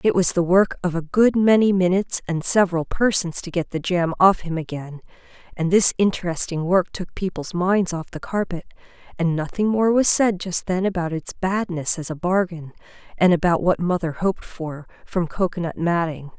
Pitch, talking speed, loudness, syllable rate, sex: 180 Hz, 185 wpm, -21 LUFS, 5.1 syllables/s, female